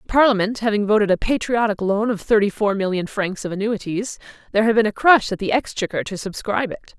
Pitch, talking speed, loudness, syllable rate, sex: 210 Hz, 205 wpm, -20 LUFS, 6.2 syllables/s, female